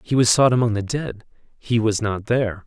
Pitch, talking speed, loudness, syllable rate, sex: 115 Hz, 225 wpm, -20 LUFS, 5.3 syllables/s, male